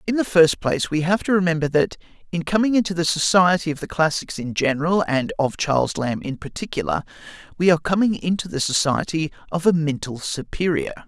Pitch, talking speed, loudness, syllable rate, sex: 170 Hz, 190 wpm, -21 LUFS, 5.9 syllables/s, male